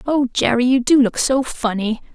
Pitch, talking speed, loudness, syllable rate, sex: 250 Hz, 195 wpm, -17 LUFS, 4.9 syllables/s, female